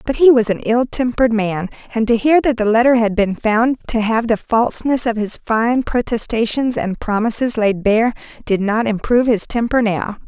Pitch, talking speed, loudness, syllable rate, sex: 230 Hz, 200 wpm, -16 LUFS, 5.0 syllables/s, female